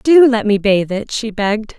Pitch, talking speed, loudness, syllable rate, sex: 220 Hz, 235 wpm, -15 LUFS, 4.6 syllables/s, female